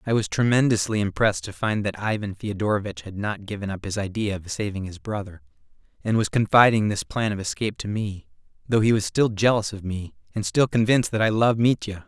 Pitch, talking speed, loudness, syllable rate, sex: 105 Hz, 210 wpm, -23 LUFS, 5.9 syllables/s, male